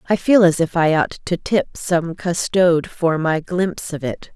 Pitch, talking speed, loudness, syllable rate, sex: 170 Hz, 205 wpm, -18 LUFS, 4.4 syllables/s, female